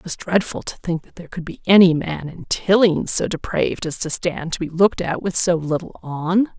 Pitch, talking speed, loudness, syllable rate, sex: 170 Hz, 235 wpm, -20 LUFS, 5.4 syllables/s, female